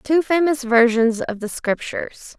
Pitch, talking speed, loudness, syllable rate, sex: 255 Hz, 150 wpm, -19 LUFS, 4.3 syllables/s, female